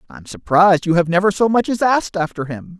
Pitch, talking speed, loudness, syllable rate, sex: 185 Hz, 235 wpm, -16 LUFS, 6.1 syllables/s, male